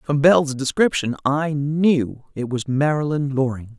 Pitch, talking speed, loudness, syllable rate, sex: 140 Hz, 145 wpm, -20 LUFS, 4.3 syllables/s, female